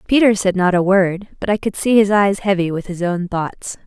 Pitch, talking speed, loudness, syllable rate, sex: 195 Hz, 250 wpm, -17 LUFS, 5.1 syllables/s, female